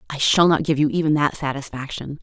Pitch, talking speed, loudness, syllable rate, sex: 150 Hz, 215 wpm, -20 LUFS, 5.9 syllables/s, female